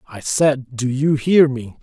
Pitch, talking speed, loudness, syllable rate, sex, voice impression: 135 Hz, 195 wpm, -17 LUFS, 3.6 syllables/s, male, masculine, adult-like, refreshing, friendly, kind